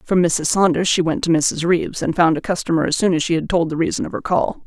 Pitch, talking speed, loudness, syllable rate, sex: 170 Hz, 295 wpm, -18 LUFS, 6.2 syllables/s, female